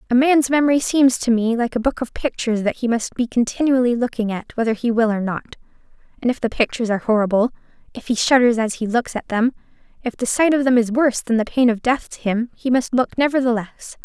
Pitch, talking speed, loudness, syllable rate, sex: 240 Hz, 235 wpm, -19 LUFS, 6.1 syllables/s, female